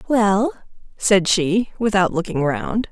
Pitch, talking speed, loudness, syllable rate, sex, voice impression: 190 Hz, 125 wpm, -19 LUFS, 3.6 syllables/s, female, very feminine, slightly gender-neutral, slightly young, slightly adult-like, thin, very tensed, powerful, bright, hard, very clear, very fluent, cute, very intellectual, slightly refreshing, sincere, slightly calm, friendly, slightly reassuring, slightly unique, wild, slightly sweet, very lively, strict, intense, slightly sharp